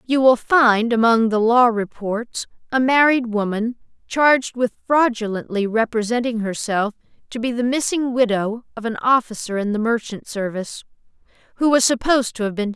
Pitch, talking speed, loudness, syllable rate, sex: 235 Hz, 160 wpm, -19 LUFS, 5.2 syllables/s, female